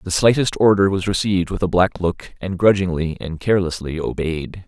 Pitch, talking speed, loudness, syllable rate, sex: 90 Hz, 180 wpm, -19 LUFS, 5.3 syllables/s, male